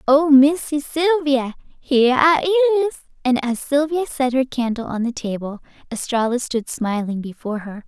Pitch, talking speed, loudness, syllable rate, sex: 265 Hz, 150 wpm, -19 LUFS, 4.9 syllables/s, female